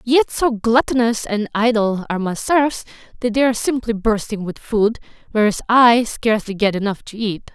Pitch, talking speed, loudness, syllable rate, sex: 225 Hz, 175 wpm, -18 LUFS, 5.0 syllables/s, female